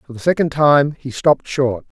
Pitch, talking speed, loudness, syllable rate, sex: 140 Hz, 210 wpm, -17 LUFS, 5.3 syllables/s, male